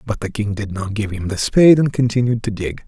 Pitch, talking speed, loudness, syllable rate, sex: 110 Hz, 270 wpm, -18 LUFS, 5.8 syllables/s, male